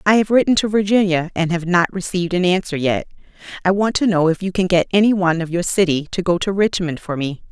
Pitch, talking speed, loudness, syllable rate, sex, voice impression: 180 Hz, 245 wpm, -18 LUFS, 6.2 syllables/s, female, very feminine, very middle-aged, thin, tensed, slightly powerful, bright, soft, clear, fluent, slightly raspy, slightly cool, intellectual, very refreshing, sincere, calm, slightly friendly, slightly reassuring, very unique, slightly elegant, lively, slightly strict, slightly intense, sharp